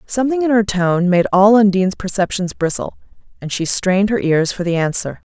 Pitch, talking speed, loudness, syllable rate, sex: 195 Hz, 190 wpm, -16 LUFS, 5.6 syllables/s, female